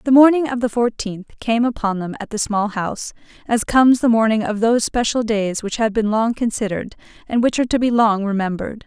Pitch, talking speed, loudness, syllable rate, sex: 225 Hz, 215 wpm, -18 LUFS, 5.9 syllables/s, female